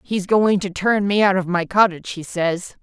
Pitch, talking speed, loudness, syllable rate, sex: 190 Hz, 235 wpm, -19 LUFS, 4.9 syllables/s, female